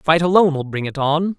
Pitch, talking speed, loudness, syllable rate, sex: 160 Hz, 260 wpm, -17 LUFS, 5.9 syllables/s, male